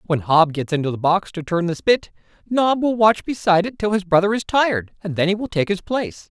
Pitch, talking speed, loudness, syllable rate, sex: 185 Hz, 255 wpm, -19 LUFS, 5.8 syllables/s, male